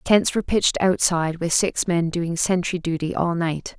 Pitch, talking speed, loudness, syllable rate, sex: 175 Hz, 190 wpm, -21 LUFS, 4.9 syllables/s, female